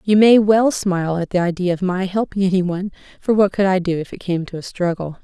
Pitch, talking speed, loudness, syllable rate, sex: 185 Hz, 250 wpm, -18 LUFS, 5.8 syllables/s, female